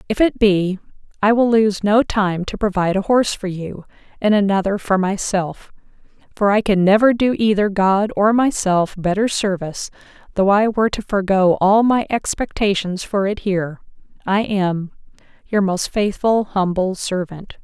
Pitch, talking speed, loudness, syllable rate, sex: 200 Hz, 160 wpm, -18 LUFS, 4.7 syllables/s, female